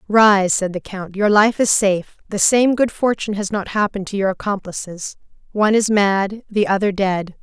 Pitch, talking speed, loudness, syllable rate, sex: 200 Hz, 185 wpm, -18 LUFS, 5.1 syllables/s, female